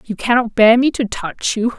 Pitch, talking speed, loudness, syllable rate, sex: 230 Hz, 235 wpm, -15 LUFS, 4.9 syllables/s, female